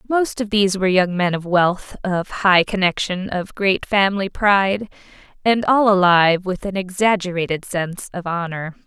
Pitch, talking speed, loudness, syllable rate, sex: 190 Hz, 160 wpm, -18 LUFS, 4.9 syllables/s, female